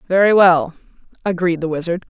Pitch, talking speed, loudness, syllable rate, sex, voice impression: 175 Hz, 140 wpm, -16 LUFS, 5.7 syllables/s, female, very feminine, old, very thin, very tensed, very powerful, very bright, very hard, very clear, fluent, slightly raspy, slightly cool, slightly intellectual, refreshing, slightly sincere, slightly calm, slightly friendly, slightly reassuring, very unique, slightly elegant, wild, very lively, very strict, very intense, very sharp, light